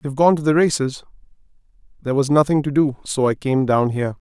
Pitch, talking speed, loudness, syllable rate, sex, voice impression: 140 Hz, 210 wpm, -19 LUFS, 6.3 syllables/s, male, very masculine, slightly middle-aged, thick, tensed, slightly powerful, slightly bright, soft, slightly muffled, fluent, slightly raspy, cool, slightly intellectual, refreshing, sincere, slightly calm, mature, friendly, reassuring, slightly unique, slightly elegant, wild, slightly sweet, lively, slightly strict, slightly modest